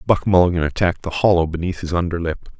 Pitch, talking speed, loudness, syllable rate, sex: 85 Hz, 185 wpm, -19 LUFS, 7.0 syllables/s, male